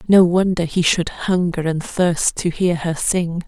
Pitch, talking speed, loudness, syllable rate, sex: 175 Hz, 190 wpm, -18 LUFS, 3.9 syllables/s, female